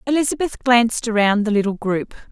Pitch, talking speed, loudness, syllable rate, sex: 230 Hz, 155 wpm, -18 LUFS, 5.8 syllables/s, female